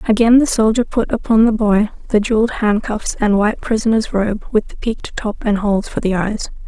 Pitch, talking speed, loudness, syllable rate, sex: 215 Hz, 205 wpm, -16 LUFS, 5.6 syllables/s, female